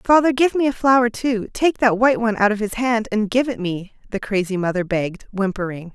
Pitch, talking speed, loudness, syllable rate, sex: 220 Hz, 230 wpm, -19 LUFS, 5.7 syllables/s, female